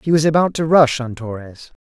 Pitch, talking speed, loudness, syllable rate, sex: 135 Hz, 225 wpm, -16 LUFS, 5.5 syllables/s, male